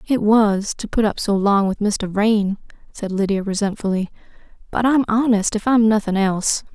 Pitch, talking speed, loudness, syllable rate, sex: 210 Hz, 180 wpm, -19 LUFS, 4.9 syllables/s, female